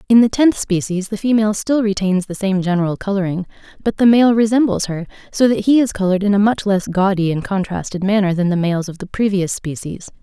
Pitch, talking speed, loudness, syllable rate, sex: 200 Hz, 215 wpm, -17 LUFS, 5.9 syllables/s, female